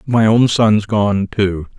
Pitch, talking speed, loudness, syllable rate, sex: 105 Hz, 170 wpm, -14 LUFS, 3.2 syllables/s, male